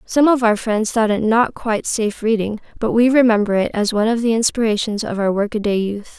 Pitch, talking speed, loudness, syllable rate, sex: 220 Hz, 225 wpm, -17 LUFS, 5.8 syllables/s, female